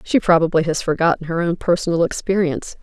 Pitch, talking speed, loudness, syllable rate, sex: 170 Hz, 170 wpm, -18 LUFS, 6.3 syllables/s, female